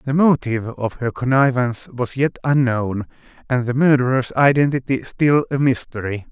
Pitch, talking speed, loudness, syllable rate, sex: 130 Hz, 140 wpm, -19 LUFS, 5.0 syllables/s, male